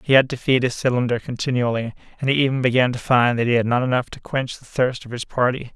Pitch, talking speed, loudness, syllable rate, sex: 125 Hz, 260 wpm, -20 LUFS, 6.3 syllables/s, male